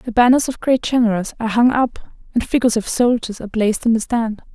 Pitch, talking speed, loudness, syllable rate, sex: 230 Hz, 225 wpm, -18 LUFS, 6.4 syllables/s, female